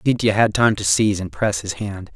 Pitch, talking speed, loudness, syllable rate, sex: 100 Hz, 250 wpm, -19 LUFS, 5.5 syllables/s, male